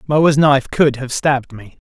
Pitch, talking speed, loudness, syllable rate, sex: 135 Hz, 195 wpm, -15 LUFS, 5.0 syllables/s, male